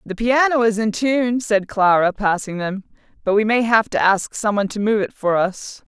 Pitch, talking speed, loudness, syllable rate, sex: 215 Hz, 220 wpm, -18 LUFS, 4.8 syllables/s, female